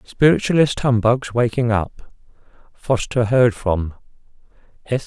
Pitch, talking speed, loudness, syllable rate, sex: 115 Hz, 70 wpm, -18 LUFS, 4.1 syllables/s, male